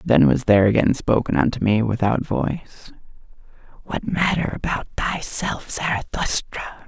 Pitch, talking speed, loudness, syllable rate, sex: 120 Hz, 120 wpm, -21 LUFS, 4.6 syllables/s, male